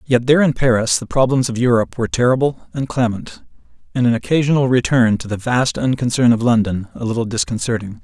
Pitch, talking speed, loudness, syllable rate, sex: 120 Hz, 185 wpm, -17 LUFS, 6.1 syllables/s, male